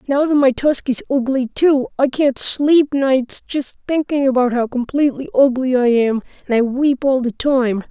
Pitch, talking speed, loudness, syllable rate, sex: 265 Hz, 190 wpm, -17 LUFS, 4.5 syllables/s, female